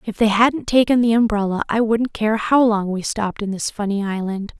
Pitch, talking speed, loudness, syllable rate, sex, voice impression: 215 Hz, 220 wpm, -19 LUFS, 5.2 syllables/s, female, very feminine, young, thin, tensed, slightly powerful, bright, soft, clear, fluent, slightly raspy, very cute, intellectual, very refreshing, sincere, calm, very friendly, very reassuring, very unique, elegant, wild, very sweet, lively, kind, modest, light